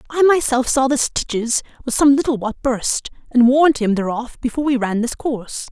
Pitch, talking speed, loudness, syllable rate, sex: 255 Hz, 200 wpm, -18 LUFS, 5.6 syllables/s, female